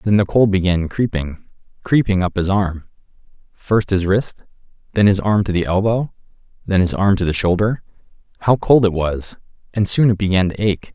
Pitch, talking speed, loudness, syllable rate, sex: 100 Hz, 185 wpm, -17 LUFS, 5.1 syllables/s, male